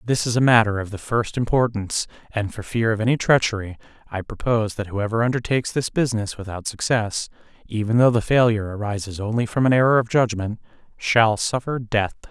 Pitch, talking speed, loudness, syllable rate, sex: 110 Hz, 180 wpm, -21 LUFS, 5.8 syllables/s, male